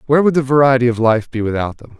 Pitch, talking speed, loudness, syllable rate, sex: 125 Hz, 270 wpm, -15 LUFS, 7.3 syllables/s, male